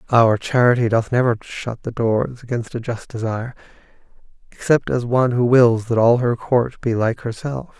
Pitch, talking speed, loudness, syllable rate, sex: 120 Hz, 175 wpm, -19 LUFS, 4.9 syllables/s, male